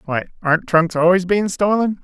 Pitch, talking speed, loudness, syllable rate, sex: 180 Hz, 175 wpm, -17 LUFS, 5.3 syllables/s, male